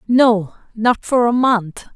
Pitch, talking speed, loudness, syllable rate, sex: 225 Hz, 155 wpm, -16 LUFS, 3.2 syllables/s, female